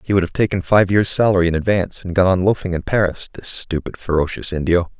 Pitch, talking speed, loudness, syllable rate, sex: 90 Hz, 230 wpm, -18 LUFS, 6.3 syllables/s, male